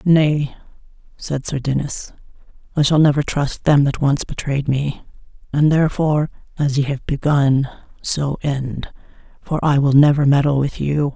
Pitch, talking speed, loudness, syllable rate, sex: 145 Hz, 150 wpm, -18 LUFS, 4.5 syllables/s, female